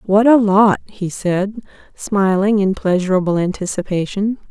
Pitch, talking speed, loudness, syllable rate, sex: 200 Hz, 120 wpm, -16 LUFS, 4.4 syllables/s, female